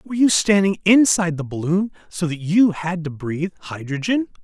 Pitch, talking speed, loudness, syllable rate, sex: 180 Hz, 175 wpm, -19 LUFS, 5.2 syllables/s, male